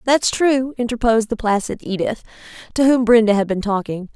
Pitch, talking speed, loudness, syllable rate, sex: 225 Hz, 190 wpm, -18 LUFS, 5.8 syllables/s, female